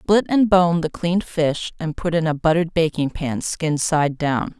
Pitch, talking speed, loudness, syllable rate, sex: 165 Hz, 210 wpm, -20 LUFS, 4.5 syllables/s, female